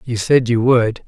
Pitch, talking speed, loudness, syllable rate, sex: 120 Hz, 220 wpm, -15 LUFS, 4.1 syllables/s, male